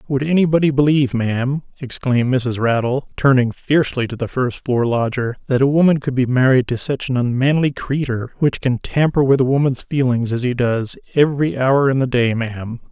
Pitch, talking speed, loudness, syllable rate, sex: 130 Hz, 190 wpm, -17 LUFS, 5.4 syllables/s, male